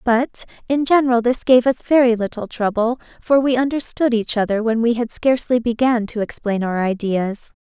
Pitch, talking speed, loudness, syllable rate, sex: 235 Hz, 180 wpm, -18 LUFS, 5.2 syllables/s, female